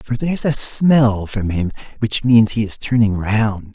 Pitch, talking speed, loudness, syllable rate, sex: 115 Hz, 190 wpm, -17 LUFS, 4.2 syllables/s, male